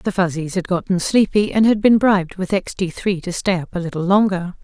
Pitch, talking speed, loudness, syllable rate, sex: 185 Hz, 235 wpm, -18 LUFS, 5.5 syllables/s, female